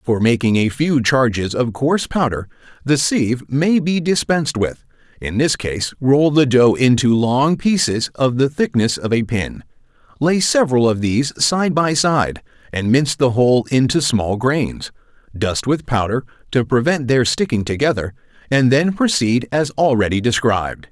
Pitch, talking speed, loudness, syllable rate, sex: 130 Hz, 165 wpm, -17 LUFS, 4.6 syllables/s, male